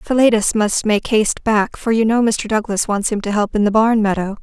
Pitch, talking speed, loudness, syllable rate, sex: 215 Hz, 245 wpm, -16 LUFS, 5.3 syllables/s, female